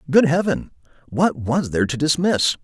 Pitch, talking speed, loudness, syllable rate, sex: 150 Hz, 160 wpm, -20 LUFS, 5.0 syllables/s, male